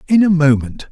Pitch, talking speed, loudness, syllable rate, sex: 160 Hz, 195 wpm, -14 LUFS, 5.5 syllables/s, male